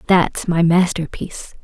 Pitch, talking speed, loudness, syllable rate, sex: 170 Hz, 110 wpm, -17 LUFS, 4.3 syllables/s, female